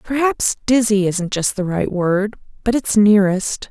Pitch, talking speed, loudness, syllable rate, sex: 210 Hz, 160 wpm, -17 LUFS, 4.3 syllables/s, female